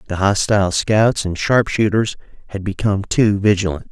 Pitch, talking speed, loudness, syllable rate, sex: 100 Hz, 140 wpm, -17 LUFS, 5.1 syllables/s, male